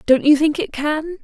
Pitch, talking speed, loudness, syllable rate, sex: 305 Hz, 245 wpm, -17 LUFS, 4.6 syllables/s, female